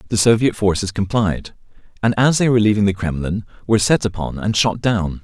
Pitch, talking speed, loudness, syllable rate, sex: 105 Hz, 195 wpm, -18 LUFS, 5.8 syllables/s, male